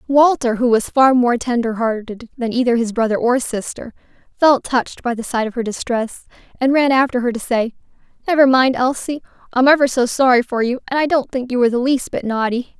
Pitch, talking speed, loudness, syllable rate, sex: 250 Hz, 220 wpm, -17 LUFS, 5.7 syllables/s, female